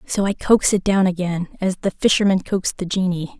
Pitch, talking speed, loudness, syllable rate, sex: 190 Hz, 210 wpm, -19 LUFS, 5.7 syllables/s, female